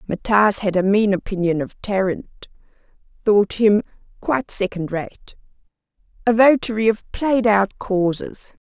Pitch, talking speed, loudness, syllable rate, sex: 205 Hz, 125 wpm, -19 LUFS, 4.2 syllables/s, female